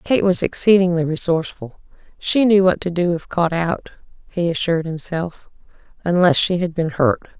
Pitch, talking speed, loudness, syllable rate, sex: 175 Hz, 155 wpm, -18 LUFS, 5.1 syllables/s, female